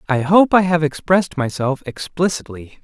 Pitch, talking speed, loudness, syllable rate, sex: 160 Hz, 150 wpm, -17 LUFS, 5.0 syllables/s, male